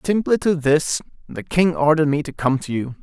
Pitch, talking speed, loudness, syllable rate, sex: 155 Hz, 220 wpm, -19 LUFS, 5.4 syllables/s, male